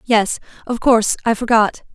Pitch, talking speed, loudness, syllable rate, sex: 225 Hz, 155 wpm, -17 LUFS, 5.0 syllables/s, female